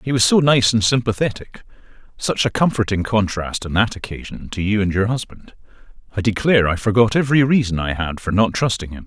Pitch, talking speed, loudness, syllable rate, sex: 105 Hz, 185 wpm, -18 LUFS, 5.9 syllables/s, male